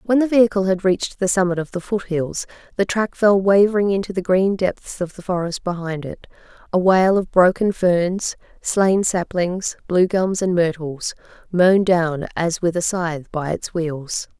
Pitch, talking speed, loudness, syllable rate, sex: 185 Hz, 180 wpm, -19 LUFS, 4.5 syllables/s, female